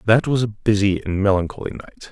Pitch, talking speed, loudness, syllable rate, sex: 105 Hz, 200 wpm, -20 LUFS, 6.6 syllables/s, male